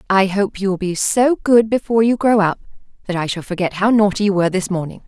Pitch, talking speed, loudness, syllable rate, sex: 200 Hz, 250 wpm, -17 LUFS, 6.2 syllables/s, female